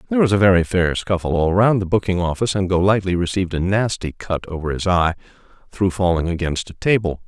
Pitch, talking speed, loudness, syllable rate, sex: 95 Hz, 205 wpm, -19 LUFS, 6.2 syllables/s, male